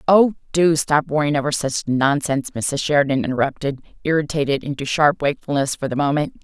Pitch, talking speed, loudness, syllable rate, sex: 145 Hz, 160 wpm, -20 LUFS, 6.0 syllables/s, female